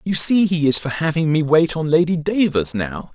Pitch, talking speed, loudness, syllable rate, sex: 155 Hz, 230 wpm, -18 LUFS, 5.0 syllables/s, male